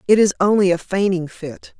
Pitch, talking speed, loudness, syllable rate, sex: 185 Hz, 200 wpm, -17 LUFS, 5.2 syllables/s, female